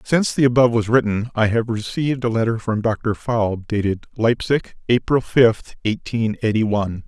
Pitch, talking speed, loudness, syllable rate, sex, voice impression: 115 Hz, 170 wpm, -19 LUFS, 5.1 syllables/s, male, masculine, adult-like, slightly powerful, slightly hard, cool, intellectual, sincere, slightly friendly, slightly reassuring, slightly wild